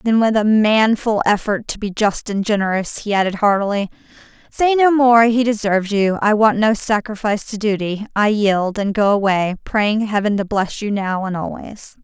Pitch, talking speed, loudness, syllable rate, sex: 210 Hz, 190 wpm, -17 LUFS, 4.9 syllables/s, female